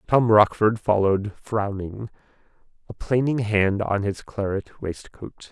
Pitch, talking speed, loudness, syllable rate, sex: 105 Hz, 120 wpm, -22 LUFS, 4.2 syllables/s, male